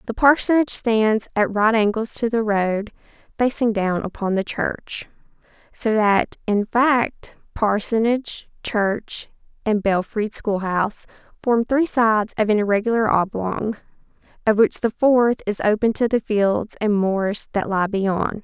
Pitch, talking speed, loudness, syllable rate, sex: 215 Hz, 145 wpm, -20 LUFS, 4.1 syllables/s, female